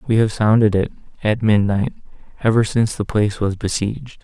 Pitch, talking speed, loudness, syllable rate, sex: 105 Hz, 170 wpm, -18 LUFS, 5.6 syllables/s, male